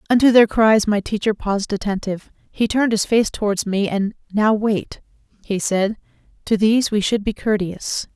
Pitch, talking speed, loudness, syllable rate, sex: 210 Hz, 175 wpm, -19 LUFS, 5.1 syllables/s, female